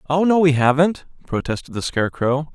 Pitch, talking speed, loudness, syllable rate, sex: 145 Hz, 165 wpm, -19 LUFS, 5.6 syllables/s, male